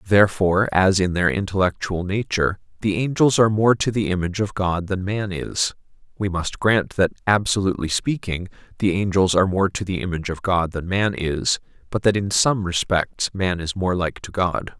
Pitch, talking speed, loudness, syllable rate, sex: 95 Hz, 190 wpm, -21 LUFS, 5.3 syllables/s, male